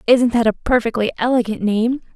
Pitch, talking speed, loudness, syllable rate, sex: 230 Hz, 165 wpm, -18 LUFS, 5.6 syllables/s, female